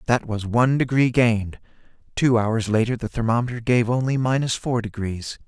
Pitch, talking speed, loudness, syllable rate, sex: 120 Hz, 165 wpm, -21 LUFS, 5.3 syllables/s, male